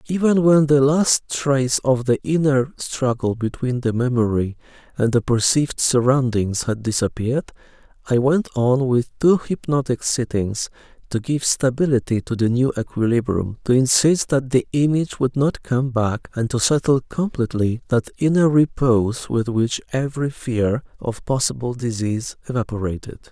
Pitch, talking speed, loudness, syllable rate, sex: 130 Hz, 145 wpm, -20 LUFS, 4.8 syllables/s, male